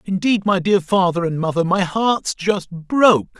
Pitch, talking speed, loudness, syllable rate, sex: 185 Hz, 175 wpm, -18 LUFS, 4.4 syllables/s, male